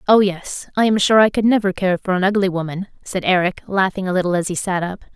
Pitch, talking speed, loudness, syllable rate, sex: 190 Hz, 255 wpm, -18 LUFS, 6.1 syllables/s, female